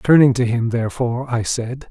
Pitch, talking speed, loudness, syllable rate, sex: 120 Hz, 190 wpm, -18 LUFS, 5.4 syllables/s, male